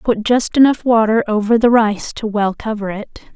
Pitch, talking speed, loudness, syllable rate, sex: 220 Hz, 195 wpm, -15 LUFS, 4.9 syllables/s, female